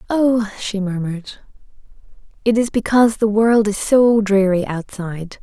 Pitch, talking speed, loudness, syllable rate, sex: 210 Hz, 135 wpm, -17 LUFS, 4.6 syllables/s, female